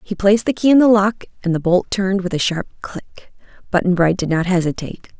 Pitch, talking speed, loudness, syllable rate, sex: 190 Hz, 230 wpm, -17 LUFS, 6.0 syllables/s, female